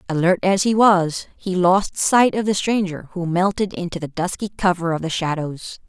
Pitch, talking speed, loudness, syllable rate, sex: 180 Hz, 195 wpm, -19 LUFS, 4.7 syllables/s, female